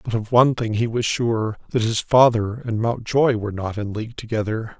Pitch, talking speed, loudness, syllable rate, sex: 115 Hz, 215 wpm, -21 LUFS, 5.3 syllables/s, male